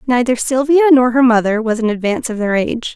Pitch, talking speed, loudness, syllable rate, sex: 240 Hz, 225 wpm, -14 LUFS, 6.3 syllables/s, female